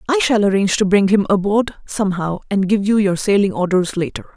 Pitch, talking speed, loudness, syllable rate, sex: 200 Hz, 205 wpm, -17 LUFS, 5.8 syllables/s, female